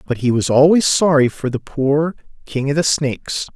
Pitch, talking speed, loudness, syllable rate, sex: 145 Hz, 205 wpm, -16 LUFS, 4.9 syllables/s, male